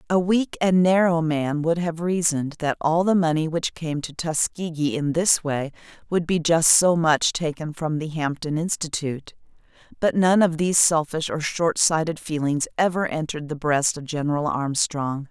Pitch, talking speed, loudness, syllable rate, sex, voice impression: 160 Hz, 175 wpm, -22 LUFS, 4.7 syllables/s, female, feminine, slightly gender-neutral, adult-like, slightly middle-aged, slightly thin, slightly relaxed, slightly weak, slightly dark, slightly hard, slightly clear, slightly fluent, slightly cool, intellectual, slightly refreshing, sincere, very calm, friendly, reassuring, elegant, kind, modest